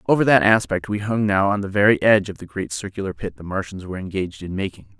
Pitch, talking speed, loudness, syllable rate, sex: 100 Hz, 250 wpm, -21 LUFS, 6.7 syllables/s, male